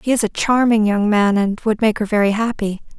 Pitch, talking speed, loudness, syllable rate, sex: 215 Hz, 240 wpm, -17 LUFS, 5.5 syllables/s, female